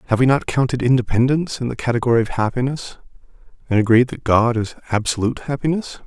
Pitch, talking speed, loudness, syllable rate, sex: 125 Hz, 170 wpm, -19 LUFS, 6.7 syllables/s, male